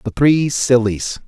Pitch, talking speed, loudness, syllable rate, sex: 125 Hz, 140 wpm, -16 LUFS, 3.6 syllables/s, male